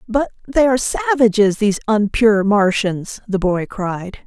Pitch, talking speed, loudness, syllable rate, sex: 215 Hz, 140 wpm, -17 LUFS, 4.7 syllables/s, female